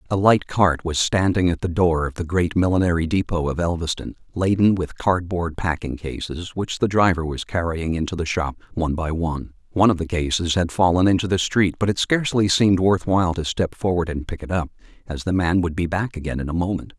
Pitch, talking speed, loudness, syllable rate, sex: 90 Hz, 225 wpm, -21 LUFS, 5.7 syllables/s, male